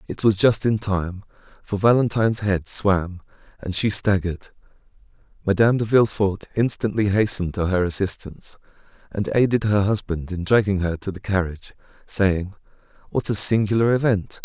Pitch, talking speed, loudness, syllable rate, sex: 100 Hz, 140 wpm, -21 LUFS, 5.3 syllables/s, male